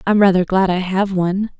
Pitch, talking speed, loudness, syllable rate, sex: 190 Hz, 225 wpm, -16 LUFS, 5.6 syllables/s, female